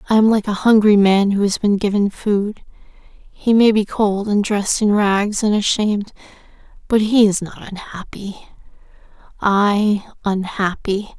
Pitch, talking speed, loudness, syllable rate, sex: 205 Hz, 150 wpm, -17 LUFS, 4.3 syllables/s, female